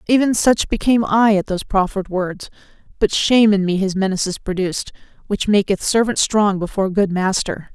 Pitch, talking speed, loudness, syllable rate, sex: 200 Hz, 170 wpm, -18 LUFS, 5.7 syllables/s, female